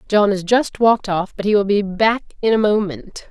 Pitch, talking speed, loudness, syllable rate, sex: 205 Hz, 235 wpm, -17 LUFS, 4.8 syllables/s, female